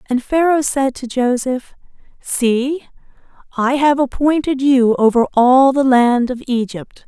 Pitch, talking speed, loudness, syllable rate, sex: 260 Hz, 135 wpm, -15 LUFS, 3.9 syllables/s, female